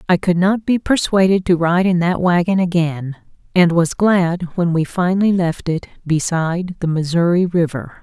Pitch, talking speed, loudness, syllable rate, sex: 175 Hz, 170 wpm, -17 LUFS, 4.7 syllables/s, female